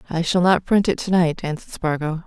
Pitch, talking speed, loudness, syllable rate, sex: 170 Hz, 210 wpm, -20 LUFS, 5.8 syllables/s, female